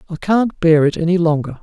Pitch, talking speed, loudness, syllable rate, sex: 170 Hz, 220 wpm, -15 LUFS, 5.8 syllables/s, male